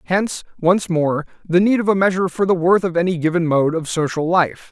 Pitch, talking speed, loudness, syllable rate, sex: 175 Hz, 230 wpm, -18 LUFS, 5.7 syllables/s, male